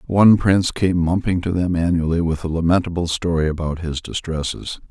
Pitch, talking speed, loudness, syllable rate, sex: 85 Hz, 170 wpm, -19 LUFS, 5.6 syllables/s, male